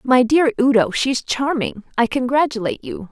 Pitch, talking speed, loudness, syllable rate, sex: 250 Hz, 155 wpm, -18 LUFS, 5.0 syllables/s, female